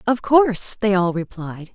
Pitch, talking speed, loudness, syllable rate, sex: 205 Hz, 170 wpm, -18 LUFS, 4.4 syllables/s, female